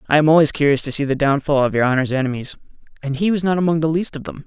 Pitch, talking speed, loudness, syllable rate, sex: 150 Hz, 280 wpm, -18 LUFS, 7.2 syllables/s, male